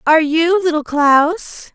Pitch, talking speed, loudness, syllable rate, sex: 320 Hz, 135 wpm, -14 LUFS, 3.8 syllables/s, female